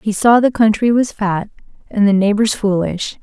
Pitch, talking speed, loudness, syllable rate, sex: 210 Hz, 185 wpm, -15 LUFS, 4.7 syllables/s, female